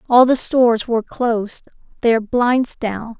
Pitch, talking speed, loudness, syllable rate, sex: 235 Hz, 150 wpm, -17 LUFS, 4.1 syllables/s, female